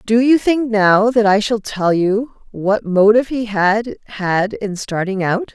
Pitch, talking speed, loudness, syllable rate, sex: 215 Hz, 185 wpm, -16 LUFS, 3.9 syllables/s, female